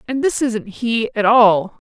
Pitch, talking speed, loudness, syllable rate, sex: 235 Hz, 195 wpm, -16 LUFS, 3.8 syllables/s, female